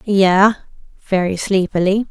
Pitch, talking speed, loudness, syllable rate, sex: 195 Hz, 85 wpm, -16 LUFS, 3.9 syllables/s, female